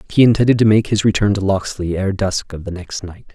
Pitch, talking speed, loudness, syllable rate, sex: 100 Hz, 250 wpm, -16 LUFS, 5.7 syllables/s, male